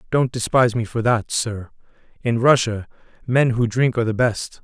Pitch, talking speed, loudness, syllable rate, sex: 115 Hz, 180 wpm, -20 LUFS, 5.1 syllables/s, male